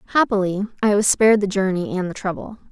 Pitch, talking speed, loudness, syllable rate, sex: 200 Hz, 200 wpm, -19 LUFS, 6.5 syllables/s, female